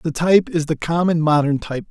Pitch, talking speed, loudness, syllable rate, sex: 160 Hz, 220 wpm, -18 LUFS, 6.2 syllables/s, male